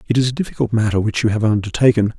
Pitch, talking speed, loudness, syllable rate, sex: 115 Hz, 245 wpm, -17 LUFS, 7.3 syllables/s, male